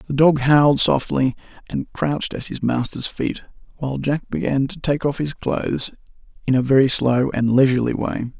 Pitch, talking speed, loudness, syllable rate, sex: 135 Hz, 180 wpm, -20 LUFS, 5.1 syllables/s, male